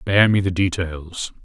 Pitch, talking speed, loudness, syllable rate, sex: 90 Hz, 165 wpm, -20 LUFS, 4.6 syllables/s, male